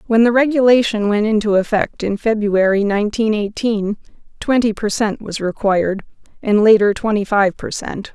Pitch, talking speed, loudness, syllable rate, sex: 215 Hz, 155 wpm, -16 LUFS, 5.0 syllables/s, female